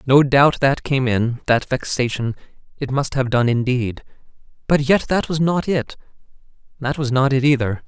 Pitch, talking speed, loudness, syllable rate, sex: 135 Hz, 175 wpm, -19 LUFS, 4.7 syllables/s, male